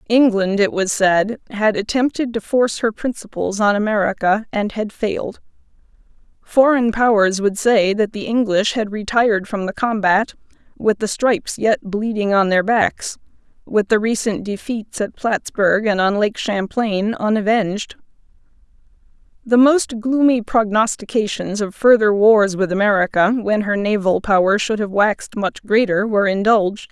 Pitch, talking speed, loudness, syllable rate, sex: 210 Hz, 145 wpm, -17 LUFS, 4.6 syllables/s, female